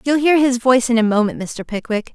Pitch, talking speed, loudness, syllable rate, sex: 240 Hz, 250 wpm, -17 LUFS, 5.9 syllables/s, female